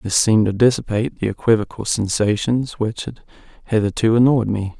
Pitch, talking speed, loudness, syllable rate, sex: 110 Hz, 150 wpm, -18 LUFS, 5.6 syllables/s, male